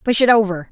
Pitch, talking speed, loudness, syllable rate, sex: 205 Hz, 250 wpm, -15 LUFS, 6.6 syllables/s, female